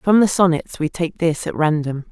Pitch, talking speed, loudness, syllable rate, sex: 165 Hz, 225 wpm, -19 LUFS, 4.9 syllables/s, female